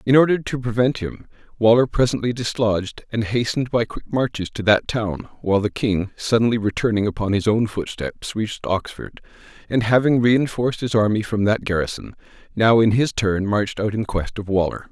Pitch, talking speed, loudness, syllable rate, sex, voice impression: 110 Hz, 180 wpm, -20 LUFS, 5.4 syllables/s, male, masculine, adult-like, slightly thick, cool, intellectual, slightly wild